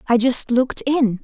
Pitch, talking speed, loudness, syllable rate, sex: 250 Hz, 195 wpm, -18 LUFS, 4.7 syllables/s, female